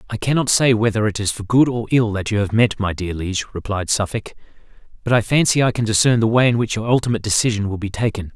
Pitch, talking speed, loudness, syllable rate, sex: 110 Hz, 250 wpm, -18 LUFS, 6.6 syllables/s, male